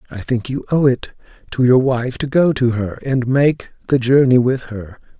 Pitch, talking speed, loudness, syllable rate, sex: 125 Hz, 210 wpm, -16 LUFS, 4.6 syllables/s, male